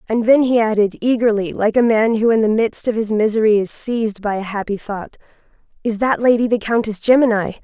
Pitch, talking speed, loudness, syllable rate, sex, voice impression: 220 Hz, 210 wpm, -17 LUFS, 5.7 syllables/s, female, feminine, adult-like, relaxed, powerful, bright, soft, fluent, intellectual, friendly, reassuring, elegant, lively, kind